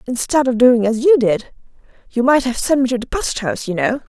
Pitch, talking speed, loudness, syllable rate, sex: 250 Hz, 245 wpm, -16 LUFS, 5.7 syllables/s, female